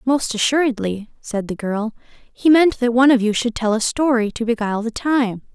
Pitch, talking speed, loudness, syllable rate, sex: 235 Hz, 205 wpm, -18 LUFS, 5.2 syllables/s, female